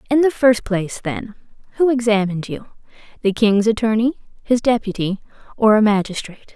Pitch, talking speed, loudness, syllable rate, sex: 220 Hz, 135 wpm, -18 LUFS, 5.7 syllables/s, female